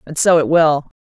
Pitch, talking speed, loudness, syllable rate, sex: 155 Hz, 235 wpm, -14 LUFS, 4.9 syllables/s, female